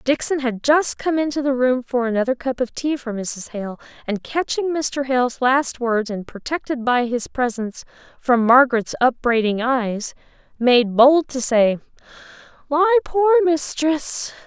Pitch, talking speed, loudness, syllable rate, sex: 260 Hz, 155 wpm, -19 LUFS, 4.4 syllables/s, female